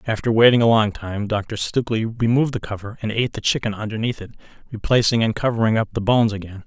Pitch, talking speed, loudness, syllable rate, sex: 110 Hz, 205 wpm, -20 LUFS, 6.6 syllables/s, male